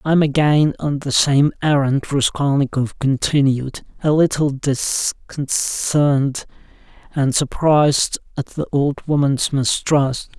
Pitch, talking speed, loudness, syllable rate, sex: 140 Hz, 110 wpm, -18 LUFS, 3.8 syllables/s, male